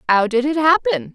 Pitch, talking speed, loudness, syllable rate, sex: 260 Hz, 210 wpm, -17 LUFS, 5.3 syllables/s, female